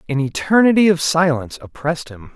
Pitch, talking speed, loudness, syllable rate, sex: 150 Hz, 155 wpm, -17 LUFS, 6.1 syllables/s, male